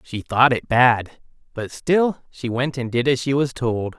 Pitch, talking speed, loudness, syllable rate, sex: 125 Hz, 210 wpm, -20 LUFS, 4.1 syllables/s, male